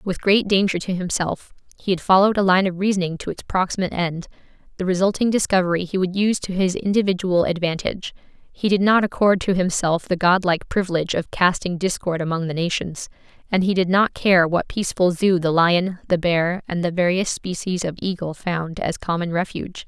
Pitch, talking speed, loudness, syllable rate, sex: 180 Hz, 190 wpm, -20 LUFS, 5.7 syllables/s, female